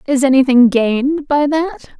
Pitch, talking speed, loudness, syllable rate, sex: 270 Hz, 150 wpm, -13 LUFS, 4.7 syllables/s, female